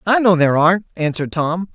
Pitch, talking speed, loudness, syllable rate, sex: 175 Hz, 205 wpm, -16 LUFS, 6.5 syllables/s, male